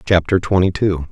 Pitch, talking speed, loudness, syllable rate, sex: 90 Hz, 160 wpm, -16 LUFS, 5.0 syllables/s, male